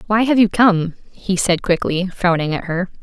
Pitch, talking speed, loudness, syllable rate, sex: 190 Hz, 200 wpm, -17 LUFS, 4.8 syllables/s, female